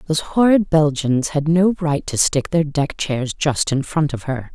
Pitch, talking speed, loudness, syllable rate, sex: 150 Hz, 210 wpm, -18 LUFS, 4.4 syllables/s, female